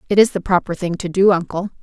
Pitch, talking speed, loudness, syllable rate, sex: 185 Hz, 265 wpm, -17 LUFS, 6.5 syllables/s, female